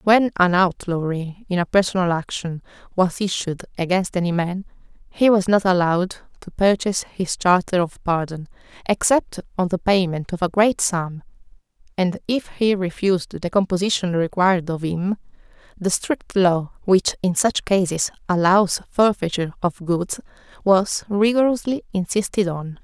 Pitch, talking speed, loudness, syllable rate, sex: 185 Hz, 140 wpm, -20 LUFS, 4.7 syllables/s, female